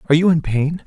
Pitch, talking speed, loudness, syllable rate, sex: 155 Hz, 275 wpm, -17 LUFS, 7.5 syllables/s, male